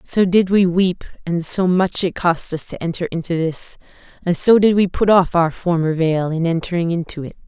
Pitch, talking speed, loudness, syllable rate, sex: 175 Hz, 215 wpm, -18 LUFS, 4.9 syllables/s, female